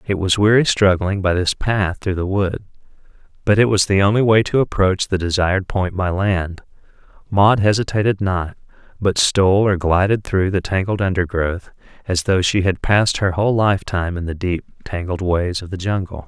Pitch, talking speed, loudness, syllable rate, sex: 95 Hz, 190 wpm, -18 LUFS, 5.0 syllables/s, male